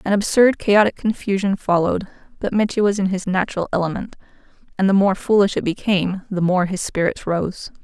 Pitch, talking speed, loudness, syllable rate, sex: 190 Hz, 175 wpm, -19 LUFS, 5.7 syllables/s, female